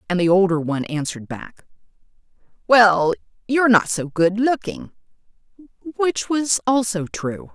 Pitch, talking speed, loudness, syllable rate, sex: 200 Hz, 125 wpm, -19 LUFS, 4.2 syllables/s, female